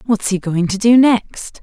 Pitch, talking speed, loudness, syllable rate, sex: 215 Hz, 220 wpm, -14 LUFS, 4.0 syllables/s, female